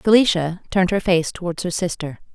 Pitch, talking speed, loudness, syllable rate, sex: 180 Hz, 180 wpm, -20 LUFS, 5.6 syllables/s, female